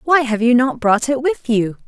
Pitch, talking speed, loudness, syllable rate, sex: 240 Hz, 255 wpm, -16 LUFS, 4.7 syllables/s, female